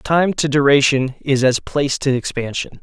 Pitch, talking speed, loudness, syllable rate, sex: 135 Hz, 170 wpm, -17 LUFS, 4.7 syllables/s, male